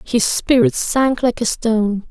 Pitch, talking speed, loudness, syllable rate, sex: 235 Hz, 170 wpm, -16 LUFS, 4.0 syllables/s, female